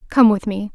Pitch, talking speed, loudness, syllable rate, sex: 210 Hz, 245 wpm, -17 LUFS, 5.3 syllables/s, female